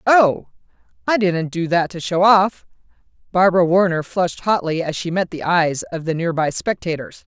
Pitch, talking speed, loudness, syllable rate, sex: 175 Hz, 170 wpm, -18 LUFS, 5.0 syllables/s, female